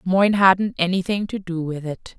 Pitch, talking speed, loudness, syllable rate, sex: 185 Hz, 190 wpm, -20 LUFS, 4.9 syllables/s, female